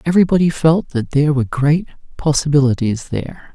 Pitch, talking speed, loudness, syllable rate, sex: 145 Hz, 135 wpm, -16 LUFS, 6.1 syllables/s, male